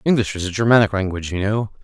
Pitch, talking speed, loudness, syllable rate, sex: 100 Hz, 230 wpm, -19 LUFS, 7.1 syllables/s, male